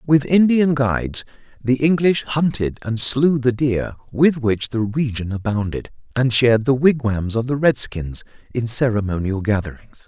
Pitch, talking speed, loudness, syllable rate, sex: 125 Hz, 150 wpm, -19 LUFS, 4.5 syllables/s, male